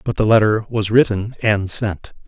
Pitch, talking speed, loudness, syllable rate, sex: 105 Hz, 185 wpm, -17 LUFS, 4.5 syllables/s, male